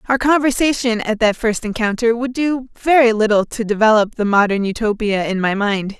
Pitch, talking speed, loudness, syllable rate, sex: 225 Hz, 180 wpm, -16 LUFS, 5.2 syllables/s, female